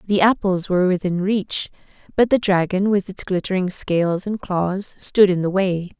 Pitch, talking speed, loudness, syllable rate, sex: 190 Hz, 180 wpm, -20 LUFS, 4.7 syllables/s, female